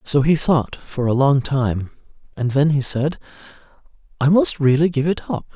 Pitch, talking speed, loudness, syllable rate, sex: 140 Hz, 185 wpm, -18 LUFS, 4.6 syllables/s, male